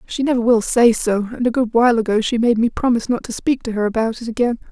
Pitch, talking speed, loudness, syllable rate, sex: 235 Hz, 280 wpm, -18 LUFS, 6.5 syllables/s, female